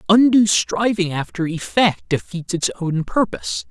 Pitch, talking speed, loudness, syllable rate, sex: 175 Hz, 130 wpm, -19 LUFS, 4.5 syllables/s, male